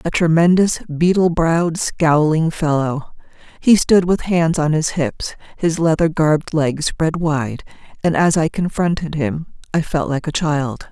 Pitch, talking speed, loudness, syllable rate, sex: 160 Hz, 160 wpm, -17 LUFS, 4.2 syllables/s, female